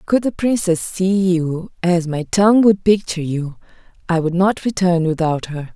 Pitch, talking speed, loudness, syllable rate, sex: 180 Hz, 175 wpm, -17 LUFS, 4.6 syllables/s, female